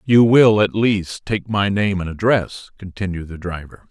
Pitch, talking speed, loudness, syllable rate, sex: 100 Hz, 185 wpm, -18 LUFS, 4.3 syllables/s, male